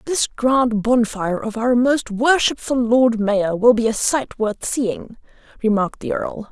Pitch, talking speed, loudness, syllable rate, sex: 230 Hz, 165 wpm, -18 LUFS, 4.1 syllables/s, female